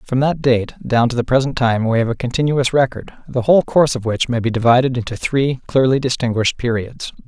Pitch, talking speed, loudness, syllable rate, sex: 125 Hz, 215 wpm, -17 LUFS, 5.9 syllables/s, male